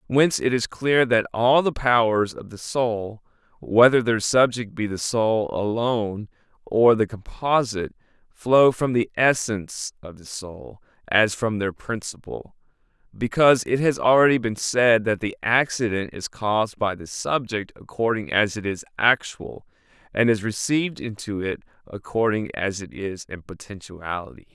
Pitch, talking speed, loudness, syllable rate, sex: 110 Hz, 150 wpm, -22 LUFS, 4.5 syllables/s, male